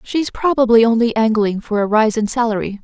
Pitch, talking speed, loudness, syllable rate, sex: 225 Hz, 190 wpm, -16 LUFS, 5.5 syllables/s, female